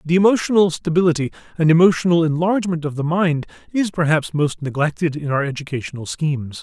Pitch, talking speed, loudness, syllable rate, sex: 160 Hz, 155 wpm, -19 LUFS, 6.2 syllables/s, male